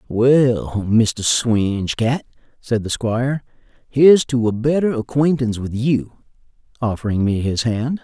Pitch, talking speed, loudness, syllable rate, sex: 120 Hz, 135 wpm, -18 LUFS, 4.2 syllables/s, male